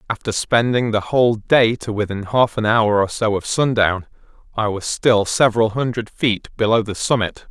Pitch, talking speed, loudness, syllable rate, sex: 110 Hz, 185 wpm, -18 LUFS, 4.8 syllables/s, male